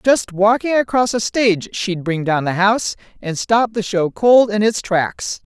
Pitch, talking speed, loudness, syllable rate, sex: 210 Hz, 195 wpm, -17 LUFS, 4.4 syllables/s, female